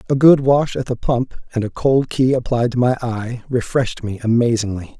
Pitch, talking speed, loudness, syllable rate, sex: 120 Hz, 205 wpm, -18 LUFS, 5.1 syllables/s, male